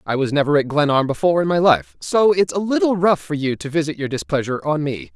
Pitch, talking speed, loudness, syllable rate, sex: 150 Hz, 255 wpm, -19 LUFS, 6.2 syllables/s, male